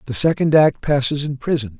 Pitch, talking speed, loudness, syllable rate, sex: 140 Hz, 200 wpm, -18 LUFS, 5.5 syllables/s, male